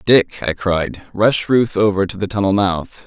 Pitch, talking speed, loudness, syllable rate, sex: 100 Hz, 195 wpm, -17 LUFS, 4.2 syllables/s, male